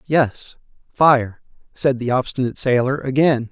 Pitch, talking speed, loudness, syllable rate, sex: 130 Hz, 120 wpm, -18 LUFS, 4.4 syllables/s, male